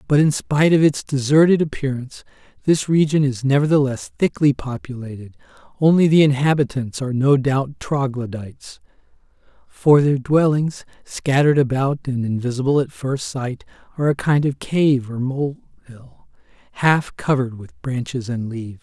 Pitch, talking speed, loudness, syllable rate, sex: 135 Hz, 135 wpm, -19 LUFS, 5.2 syllables/s, male